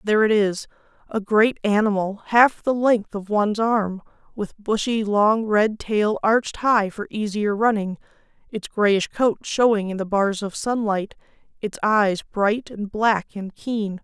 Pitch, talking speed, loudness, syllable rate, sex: 210 Hz, 160 wpm, -21 LUFS, 4.0 syllables/s, female